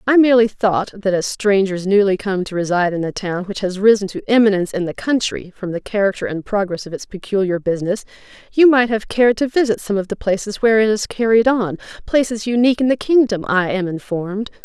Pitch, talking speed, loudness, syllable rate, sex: 205 Hz, 215 wpm, -17 LUFS, 6.0 syllables/s, female